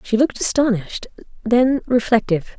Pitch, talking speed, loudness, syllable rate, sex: 240 Hz, 115 wpm, -18 LUFS, 5.9 syllables/s, female